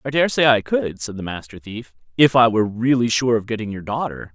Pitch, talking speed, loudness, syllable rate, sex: 115 Hz, 235 wpm, -19 LUFS, 6.0 syllables/s, male